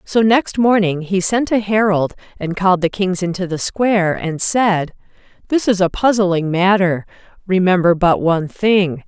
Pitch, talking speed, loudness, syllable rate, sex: 190 Hz, 165 wpm, -16 LUFS, 4.5 syllables/s, female